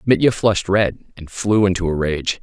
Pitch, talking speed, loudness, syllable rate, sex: 95 Hz, 200 wpm, -18 LUFS, 5.1 syllables/s, male